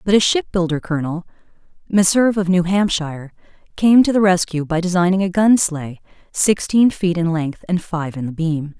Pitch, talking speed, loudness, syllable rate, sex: 180 Hz, 185 wpm, -17 LUFS, 5.2 syllables/s, female